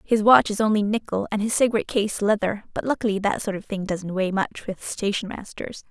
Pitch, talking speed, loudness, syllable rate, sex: 210 Hz, 225 wpm, -23 LUFS, 5.7 syllables/s, female